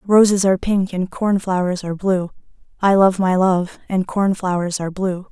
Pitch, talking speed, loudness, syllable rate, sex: 185 Hz, 190 wpm, -18 LUFS, 5.1 syllables/s, female